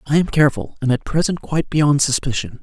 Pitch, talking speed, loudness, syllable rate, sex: 145 Hz, 205 wpm, -18 LUFS, 6.1 syllables/s, female